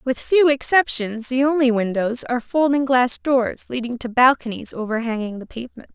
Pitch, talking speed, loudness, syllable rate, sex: 250 Hz, 160 wpm, -19 LUFS, 5.2 syllables/s, female